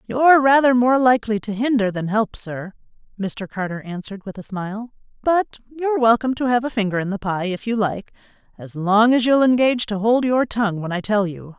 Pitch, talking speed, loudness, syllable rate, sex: 220 Hz, 210 wpm, -19 LUFS, 5.7 syllables/s, female